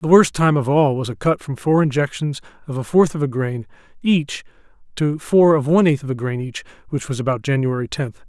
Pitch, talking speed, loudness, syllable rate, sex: 145 Hz, 230 wpm, -19 LUFS, 5.6 syllables/s, male